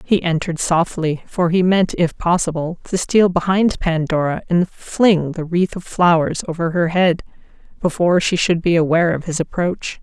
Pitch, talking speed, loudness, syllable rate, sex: 170 Hz, 175 wpm, -18 LUFS, 4.8 syllables/s, female